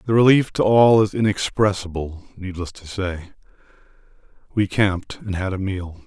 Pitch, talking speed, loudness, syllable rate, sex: 100 Hz, 150 wpm, -20 LUFS, 5.2 syllables/s, male